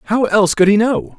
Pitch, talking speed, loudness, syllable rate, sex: 205 Hz, 255 wpm, -14 LUFS, 6.1 syllables/s, male